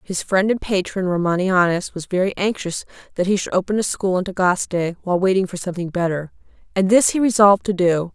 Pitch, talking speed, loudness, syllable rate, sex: 185 Hz, 200 wpm, -19 LUFS, 5.9 syllables/s, female